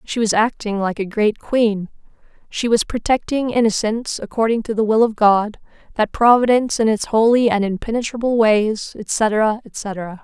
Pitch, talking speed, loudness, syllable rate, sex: 220 Hz, 160 wpm, -18 LUFS, 4.7 syllables/s, female